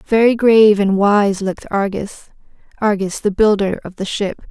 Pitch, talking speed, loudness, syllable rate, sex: 205 Hz, 145 wpm, -15 LUFS, 4.9 syllables/s, female